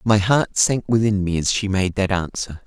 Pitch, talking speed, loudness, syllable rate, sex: 100 Hz, 225 wpm, -20 LUFS, 4.8 syllables/s, male